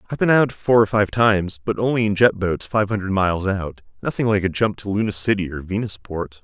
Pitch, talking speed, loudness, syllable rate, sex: 100 Hz, 235 wpm, -20 LUFS, 5.8 syllables/s, male